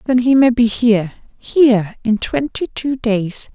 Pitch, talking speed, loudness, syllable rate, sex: 235 Hz, 150 wpm, -16 LUFS, 4.2 syllables/s, female